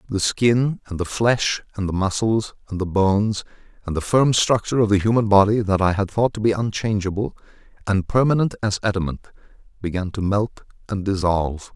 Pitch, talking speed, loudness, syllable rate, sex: 100 Hz, 180 wpm, -21 LUFS, 5.5 syllables/s, male